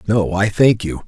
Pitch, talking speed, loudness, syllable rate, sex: 100 Hz, 225 wpm, -16 LUFS, 4.4 syllables/s, male